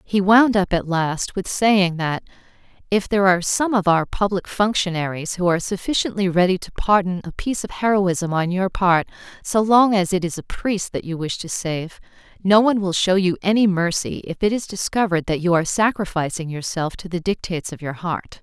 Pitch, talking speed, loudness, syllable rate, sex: 185 Hz, 205 wpm, -20 LUFS, 5.4 syllables/s, female